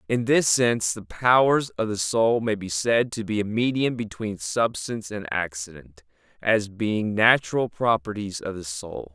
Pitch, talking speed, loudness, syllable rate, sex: 105 Hz, 170 wpm, -23 LUFS, 4.4 syllables/s, male